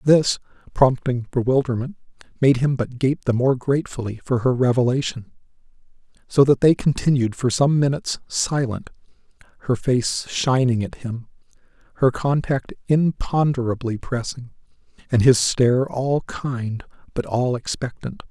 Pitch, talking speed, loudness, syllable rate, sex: 130 Hz, 125 wpm, -21 LUFS, 4.6 syllables/s, male